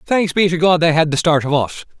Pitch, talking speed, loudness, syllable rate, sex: 165 Hz, 300 wpm, -15 LUFS, 5.7 syllables/s, male